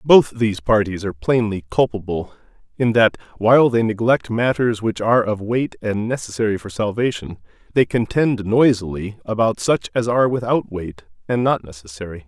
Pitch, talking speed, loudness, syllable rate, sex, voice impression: 110 Hz, 155 wpm, -19 LUFS, 5.2 syllables/s, male, very masculine, adult-like, slightly thick, cool, sincere, slightly wild, slightly kind